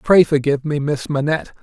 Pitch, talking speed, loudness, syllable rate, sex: 145 Hz, 185 wpm, -18 LUFS, 6.2 syllables/s, male